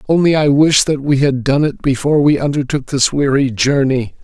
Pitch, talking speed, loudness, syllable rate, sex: 140 Hz, 200 wpm, -14 LUFS, 5.3 syllables/s, male